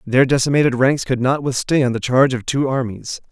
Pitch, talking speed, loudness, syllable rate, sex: 130 Hz, 200 wpm, -17 LUFS, 5.5 syllables/s, male